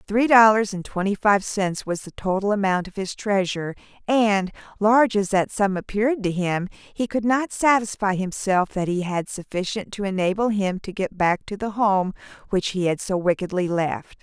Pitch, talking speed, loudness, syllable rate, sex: 200 Hz, 190 wpm, -22 LUFS, 4.9 syllables/s, female